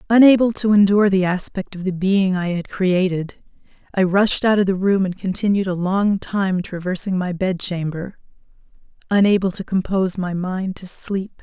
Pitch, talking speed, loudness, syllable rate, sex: 190 Hz, 175 wpm, -19 LUFS, 4.9 syllables/s, female